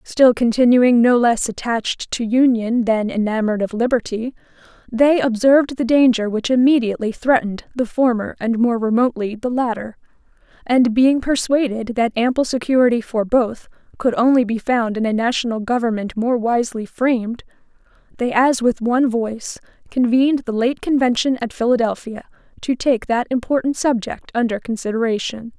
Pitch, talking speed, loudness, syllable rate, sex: 240 Hz, 145 wpm, -18 LUFS, 5.2 syllables/s, female